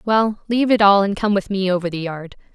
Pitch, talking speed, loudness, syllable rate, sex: 200 Hz, 260 wpm, -18 LUFS, 6.0 syllables/s, female